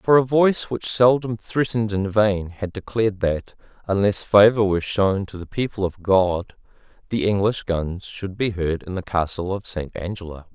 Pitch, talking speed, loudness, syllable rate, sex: 100 Hz, 180 wpm, -21 LUFS, 4.8 syllables/s, male